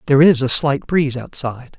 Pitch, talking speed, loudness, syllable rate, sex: 140 Hz, 200 wpm, -17 LUFS, 6.1 syllables/s, male